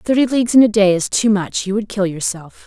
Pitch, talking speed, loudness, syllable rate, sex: 205 Hz, 270 wpm, -16 LUFS, 5.7 syllables/s, female